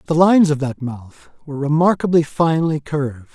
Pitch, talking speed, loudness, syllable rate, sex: 150 Hz, 160 wpm, -17 LUFS, 5.7 syllables/s, male